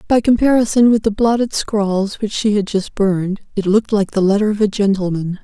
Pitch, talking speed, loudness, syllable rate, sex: 205 Hz, 210 wpm, -16 LUFS, 5.5 syllables/s, female